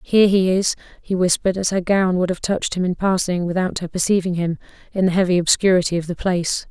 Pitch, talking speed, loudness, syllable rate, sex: 180 Hz, 225 wpm, -19 LUFS, 6.3 syllables/s, female